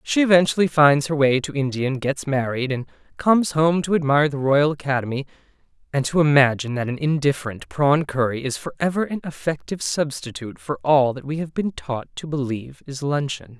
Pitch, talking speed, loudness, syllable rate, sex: 140 Hz, 190 wpm, -21 LUFS, 5.7 syllables/s, male